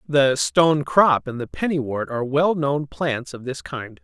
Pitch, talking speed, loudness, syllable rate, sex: 140 Hz, 195 wpm, -21 LUFS, 4.3 syllables/s, male